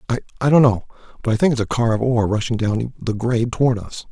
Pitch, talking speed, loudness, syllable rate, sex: 115 Hz, 250 wpm, -19 LUFS, 6.8 syllables/s, male